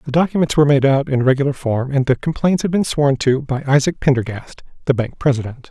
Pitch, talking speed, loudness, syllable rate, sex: 140 Hz, 220 wpm, -17 LUFS, 6.0 syllables/s, male